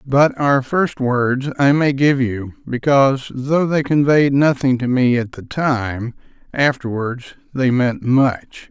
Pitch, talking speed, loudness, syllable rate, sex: 135 Hz, 150 wpm, -17 LUFS, 3.6 syllables/s, male